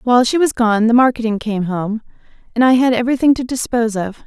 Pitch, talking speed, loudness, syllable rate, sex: 235 Hz, 210 wpm, -16 LUFS, 6.3 syllables/s, female